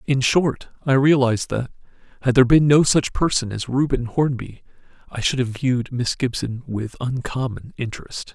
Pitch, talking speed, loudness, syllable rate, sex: 130 Hz, 165 wpm, -20 LUFS, 5.1 syllables/s, male